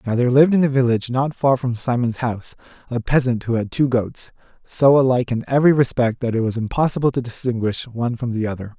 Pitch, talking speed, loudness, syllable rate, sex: 125 Hz, 220 wpm, -19 LUFS, 6.4 syllables/s, male